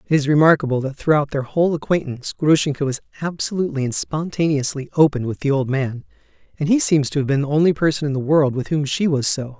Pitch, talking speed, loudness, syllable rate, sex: 145 Hz, 220 wpm, -19 LUFS, 6.3 syllables/s, male